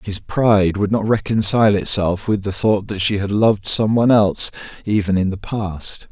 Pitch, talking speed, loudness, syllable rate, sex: 100 Hz, 195 wpm, -17 LUFS, 5.1 syllables/s, male